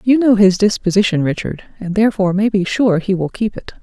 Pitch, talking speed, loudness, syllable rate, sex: 200 Hz, 220 wpm, -15 LUFS, 5.9 syllables/s, female